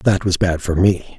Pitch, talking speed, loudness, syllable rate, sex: 90 Hz, 255 wpm, -17 LUFS, 4.4 syllables/s, male